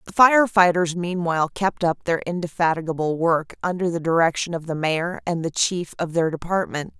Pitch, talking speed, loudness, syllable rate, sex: 170 Hz, 180 wpm, -21 LUFS, 5.1 syllables/s, female